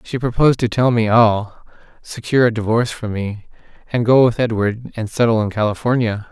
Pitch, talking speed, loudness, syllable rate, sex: 115 Hz, 180 wpm, -17 LUFS, 5.6 syllables/s, male